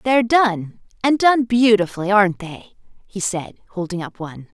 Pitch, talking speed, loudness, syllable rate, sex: 205 Hz, 155 wpm, -18 LUFS, 5.1 syllables/s, female